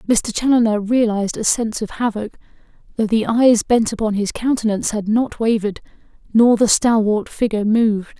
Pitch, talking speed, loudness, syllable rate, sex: 220 Hz, 160 wpm, -17 LUFS, 5.5 syllables/s, female